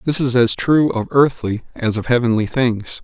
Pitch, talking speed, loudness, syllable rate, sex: 120 Hz, 200 wpm, -17 LUFS, 4.7 syllables/s, male